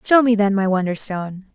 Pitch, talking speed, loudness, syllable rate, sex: 205 Hz, 195 wpm, -19 LUFS, 5.7 syllables/s, female